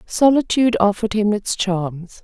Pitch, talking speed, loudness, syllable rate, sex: 210 Hz, 135 wpm, -18 LUFS, 4.8 syllables/s, female